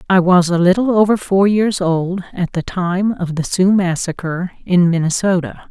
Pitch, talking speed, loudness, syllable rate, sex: 185 Hz, 180 wpm, -16 LUFS, 4.5 syllables/s, female